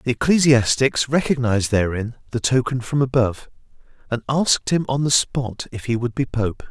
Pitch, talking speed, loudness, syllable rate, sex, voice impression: 125 Hz, 170 wpm, -20 LUFS, 5.2 syllables/s, male, very masculine, very middle-aged, very thick, relaxed, weak, slightly dark, very soft, muffled, slightly raspy, very cool, very intellectual, slightly refreshing, very sincere, very calm, very mature, very friendly, very reassuring, very unique, elegant, wild, very sweet, slightly lively, kind, modest